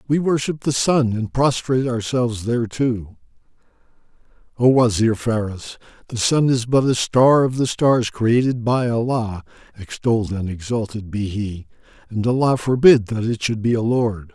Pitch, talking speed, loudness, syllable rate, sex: 115 Hz, 155 wpm, -19 LUFS, 4.1 syllables/s, male